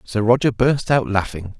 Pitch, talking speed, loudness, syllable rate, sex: 115 Hz, 190 wpm, -18 LUFS, 4.7 syllables/s, male